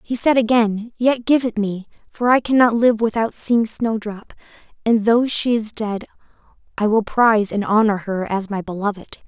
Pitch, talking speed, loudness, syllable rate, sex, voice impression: 220 Hz, 180 wpm, -18 LUFS, 4.7 syllables/s, female, slightly gender-neutral, young, tensed, bright, soft, slightly muffled, slightly cute, friendly, reassuring, lively, kind